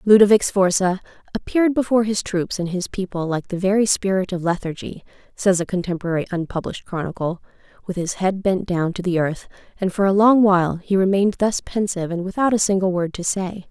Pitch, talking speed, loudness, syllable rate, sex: 190 Hz, 195 wpm, -20 LUFS, 5.9 syllables/s, female